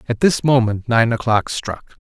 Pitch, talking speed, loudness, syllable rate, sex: 120 Hz, 180 wpm, -17 LUFS, 4.4 syllables/s, male